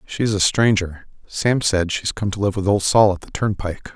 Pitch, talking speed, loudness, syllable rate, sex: 100 Hz, 230 wpm, -19 LUFS, 5.2 syllables/s, male